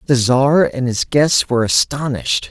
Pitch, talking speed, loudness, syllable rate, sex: 135 Hz, 165 wpm, -15 LUFS, 4.7 syllables/s, male